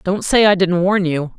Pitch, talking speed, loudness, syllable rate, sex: 185 Hz, 260 wpm, -15 LUFS, 4.7 syllables/s, female